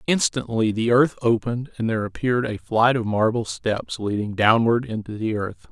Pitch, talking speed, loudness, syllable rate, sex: 115 Hz, 180 wpm, -22 LUFS, 5.1 syllables/s, male